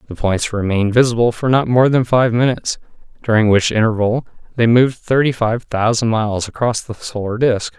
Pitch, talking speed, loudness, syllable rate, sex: 115 Hz, 175 wpm, -16 LUFS, 5.6 syllables/s, male